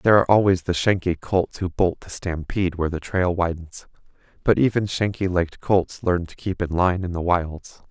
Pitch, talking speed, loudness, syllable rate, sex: 90 Hz, 205 wpm, -22 LUFS, 5.2 syllables/s, male